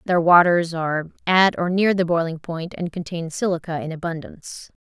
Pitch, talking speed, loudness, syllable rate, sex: 170 Hz, 175 wpm, -20 LUFS, 5.2 syllables/s, female